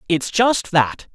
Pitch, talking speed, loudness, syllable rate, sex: 180 Hz, 155 wpm, -18 LUFS, 3.2 syllables/s, male